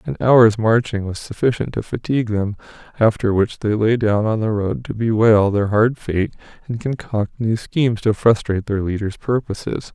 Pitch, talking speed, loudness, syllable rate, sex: 110 Hz, 180 wpm, -19 LUFS, 4.9 syllables/s, male